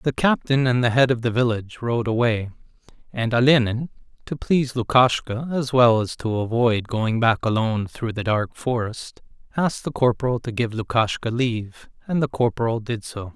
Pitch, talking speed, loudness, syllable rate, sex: 120 Hz, 175 wpm, -22 LUFS, 5.1 syllables/s, male